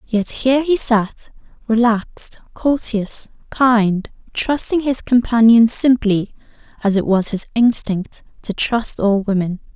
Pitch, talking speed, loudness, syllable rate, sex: 225 Hz, 125 wpm, -17 LUFS, 3.8 syllables/s, female